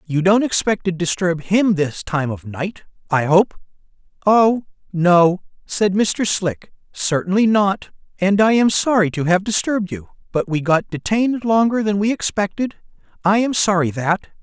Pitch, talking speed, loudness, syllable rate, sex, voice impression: 190 Hz, 160 wpm, -18 LUFS, 4.5 syllables/s, male, masculine, adult-like, slightly tensed, powerful, bright, raspy, slightly intellectual, friendly, unique, lively, slightly intense, light